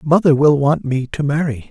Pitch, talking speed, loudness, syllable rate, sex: 145 Hz, 210 wpm, -16 LUFS, 5.0 syllables/s, male